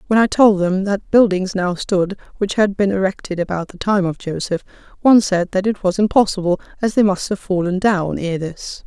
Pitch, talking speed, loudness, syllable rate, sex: 190 Hz, 210 wpm, -18 LUFS, 5.2 syllables/s, female